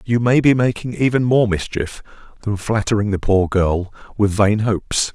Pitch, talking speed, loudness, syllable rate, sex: 105 Hz, 175 wpm, -18 LUFS, 4.8 syllables/s, male